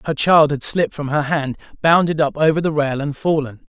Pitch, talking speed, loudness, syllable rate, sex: 150 Hz, 225 wpm, -18 LUFS, 5.5 syllables/s, male